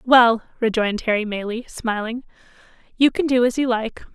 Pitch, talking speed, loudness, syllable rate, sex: 235 Hz, 160 wpm, -20 LUFS, 5.4 syllables/s, female